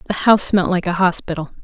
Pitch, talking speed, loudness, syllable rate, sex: 180 Hz, 220 wpm, -17 LUFS, 6.5 syllables/s, female